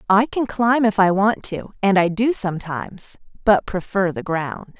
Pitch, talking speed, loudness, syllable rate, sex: 195 Hz, 190 wpm, -20 LUFS, 4.5 syllables/s, female